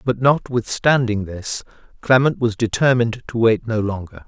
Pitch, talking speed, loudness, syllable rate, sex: 115 Hz, 140 wpm, -19 LUFS, 4.8 syllables/s, male